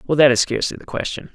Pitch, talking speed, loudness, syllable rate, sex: 135 Hz, 265 wpm, -19 LUFS, 7.8 syllables/s, male